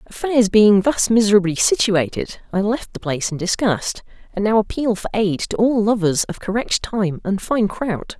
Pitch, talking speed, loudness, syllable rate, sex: 210 Hz, 185 wpm, -18 LUFS, 4.8 syllables/s, female